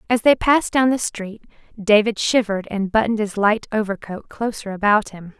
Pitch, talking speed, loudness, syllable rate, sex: 215 Hz, 180 wpm, -19 LUFS, 5.4 syllables/s, female